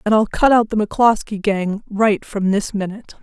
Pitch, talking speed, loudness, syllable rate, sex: 210 Hz, 205 wpm, -18 LUFS, 5.2 syllables/s, female